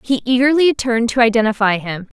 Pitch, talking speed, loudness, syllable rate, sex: 235 Hz, 165 wpm, -15 LUFS, 6.1 syllables/s, female